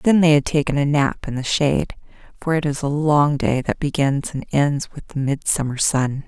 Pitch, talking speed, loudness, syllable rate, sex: 145 Hz, 220 wpm, -20 LUFS, 5.0 syllables/s, female